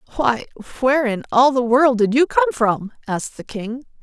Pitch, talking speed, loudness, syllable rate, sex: 250 Hz, 195 wpm, -18 LUFS, 5.3 syllables/s, female